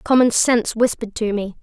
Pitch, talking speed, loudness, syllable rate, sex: 225 Hz, 185 wpm, -18 LUFS, 6.0 syllables/s, female